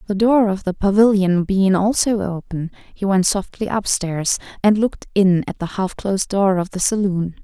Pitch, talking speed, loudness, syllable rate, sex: 195 Hz, 185 wpm, -18 LUFS, 4.8 syllables/s, female